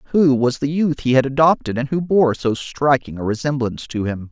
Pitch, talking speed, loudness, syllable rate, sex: 135 Hz, 225 wpm, -18 LUFS, 5.4 syllables/s, male